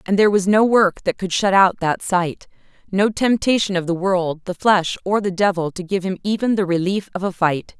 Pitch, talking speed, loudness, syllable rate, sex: 190 Hz, 225 wpm, -19 LUFS, 5.2 syllables/s, female